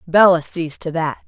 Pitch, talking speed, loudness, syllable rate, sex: 165 Hz, 190 wpm, -17 LUFS, 4.8 syllables/s, female